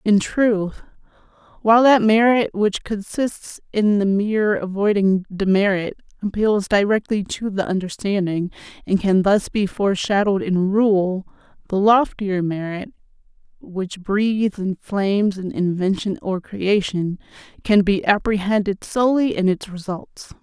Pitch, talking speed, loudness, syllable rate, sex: 200 Hz, 125 wpm, -20 LUFS, 4.3 syllables/s, female